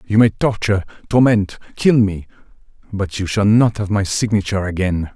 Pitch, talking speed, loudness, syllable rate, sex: 100 Hz, 165 wpm, -17 LUFS, 5.3 syllables/s, male